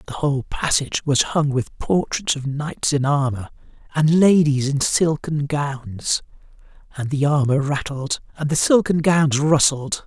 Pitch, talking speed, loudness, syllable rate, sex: 145 Hz, 150 wpm, -20 LUFS, 4.2 syllables/s, male